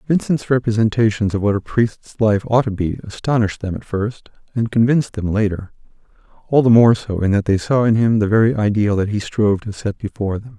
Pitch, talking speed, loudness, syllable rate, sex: 110 Hz, 210 wpm, -18 LUFS, 5.8 syllables/s, male